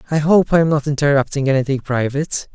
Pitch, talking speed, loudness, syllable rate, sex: 145 Hz, 165 wpm, -17 LUFS, 6.2 syllables/s, male